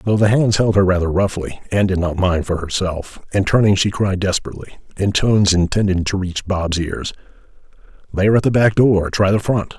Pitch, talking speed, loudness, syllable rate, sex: 95 Hz, 210 wpm, -17 LUFS, 5.8 syllables/s, male